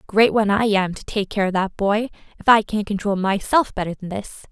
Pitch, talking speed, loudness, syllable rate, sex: 205 Hz, 240 wpm, -20 LUFS, 5.5 syllables/s, female